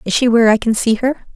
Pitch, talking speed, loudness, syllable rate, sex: 230 Hz, 310 wpm, -14 LUFS, 6.8 syllables/s, female